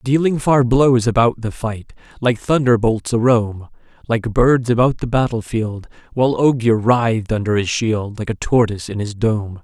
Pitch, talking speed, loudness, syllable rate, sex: 115 Hz, 180 wpm, -17 LUFS, 4.7 syllables/s, male